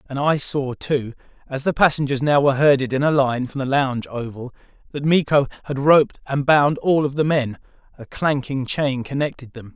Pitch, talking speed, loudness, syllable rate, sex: 135 Hz, 195 wpm, -20 LUFS, 5.2 syllables/s, male